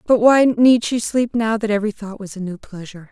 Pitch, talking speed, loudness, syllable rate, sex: 215 Hz, 250 wpm, -17 LUFS, 5.7 syllables/s, female